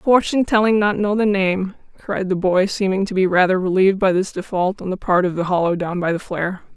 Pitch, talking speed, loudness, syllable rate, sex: 190 Hz, 240 wpm, -18 LUFS, 5.8 syllables/s, female